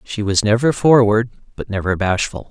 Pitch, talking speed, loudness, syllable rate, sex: 110 Hz, 170 wpm, -16 LUFS, 5.1 syllables/s, male